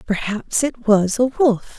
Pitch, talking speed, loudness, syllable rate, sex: 230 Hz, 170 wpm, -18 LUFS, 3.6 syllables/s, female